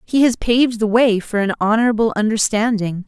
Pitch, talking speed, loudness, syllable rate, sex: 220 Hz, 175 wpm, -17 LUFS, 5.5 syllables/s, female